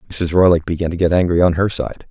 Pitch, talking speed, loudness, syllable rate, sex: 85 Hz, 255 wpm, -16 LUFS, 6.7 syllables/s, male